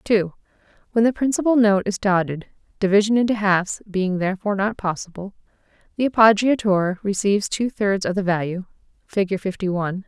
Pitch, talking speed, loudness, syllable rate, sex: 200 Hz, 150 wpm, -20 LUFS, 4.2 syllables/s, female